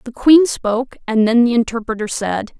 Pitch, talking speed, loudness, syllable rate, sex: 235 Hz, 185 wpm, -16 LUFS, 5.3 syllables/s, female